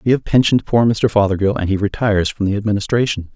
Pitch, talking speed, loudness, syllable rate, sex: 105 Hz, 215 wpm, -16 LUFS, 6.8 syllables/s, male